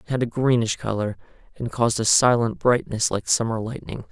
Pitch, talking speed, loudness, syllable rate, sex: 115 Hz, 190 wpm, -22 LUFS, 5.6 syllables/s, male